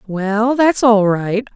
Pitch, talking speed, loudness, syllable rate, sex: 220 Hz, 155 wpm, -15 LUFS, 3.1 syllables/s, female